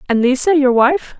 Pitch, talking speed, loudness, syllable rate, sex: 270 Hz, 200 wpm, -13 LUFS, 4.0 syllables/s, female